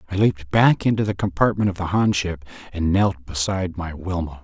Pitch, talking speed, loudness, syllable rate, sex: 90 Hz, 205 wpm, -21 LUFS, 5.6 syllables/s, male